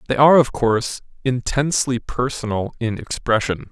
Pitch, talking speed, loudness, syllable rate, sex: 125 Hz, 130 wpm, -19 LUFS, 5.3 syllables/s, male